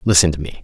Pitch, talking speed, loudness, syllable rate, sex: 85 Hz, 285 wpm, -16 LUFS, 7.6 syllables/s, male